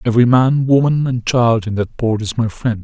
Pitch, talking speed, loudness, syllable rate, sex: 120 Hz, 235 wpm, -15 LUFS, 5.1 syllables/s, male